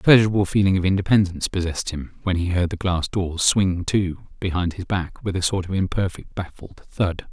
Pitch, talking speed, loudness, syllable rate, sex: 90 Hz, 205 wpm, -22 LUFS, 5.6 syllables/s, male